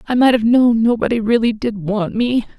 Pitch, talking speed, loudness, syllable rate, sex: 225 Hz, 210 wpm, -16 LUFS, 5.2 syllables/s, female